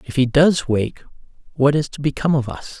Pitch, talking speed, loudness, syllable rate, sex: 140 Hz, 215 wpm, -19 LUFS, 5.5 syllables/s, male